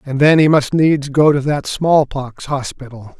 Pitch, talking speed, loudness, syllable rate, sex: 140 Hz, 190 wpm, -15 LUFS, 4.2 syllables/s, male